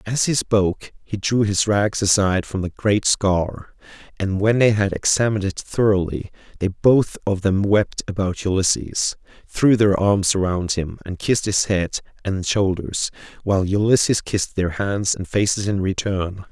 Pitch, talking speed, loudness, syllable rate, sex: 100 Hz, 165 wpm, -20 LUFS, 4.5 syllables/s, male